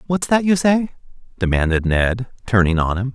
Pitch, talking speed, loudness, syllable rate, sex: 120 Hz, 170 wpm, -18 LUFS, 5.0 syllables/s, male